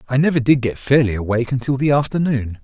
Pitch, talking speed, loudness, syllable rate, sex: 130 Hz, 205 wpm, -18 LUFS, 6.5 syllables/s, male